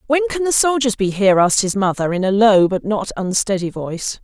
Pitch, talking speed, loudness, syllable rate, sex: 210 Hz, 225 wpm, -17 LUFS, 5.8 syllables/s, female